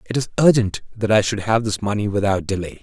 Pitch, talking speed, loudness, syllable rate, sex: 105 Hz, 235 wpm, -19 LUFS, 5.9 syllables/s, male